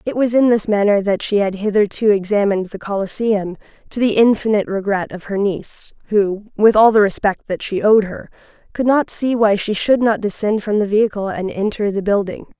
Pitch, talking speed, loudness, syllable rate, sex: 205 Hz, 195 wpm, -17 LUFS, 5.4 syllables/s, female